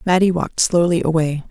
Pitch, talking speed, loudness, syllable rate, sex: 170 Hz, 160 wpm, -17 LUFS, 6.2 syllables/s, female